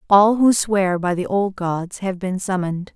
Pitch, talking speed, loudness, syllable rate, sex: 190 Hz, 205 wpm, -19 LUFS, 4.3 syllables/s, female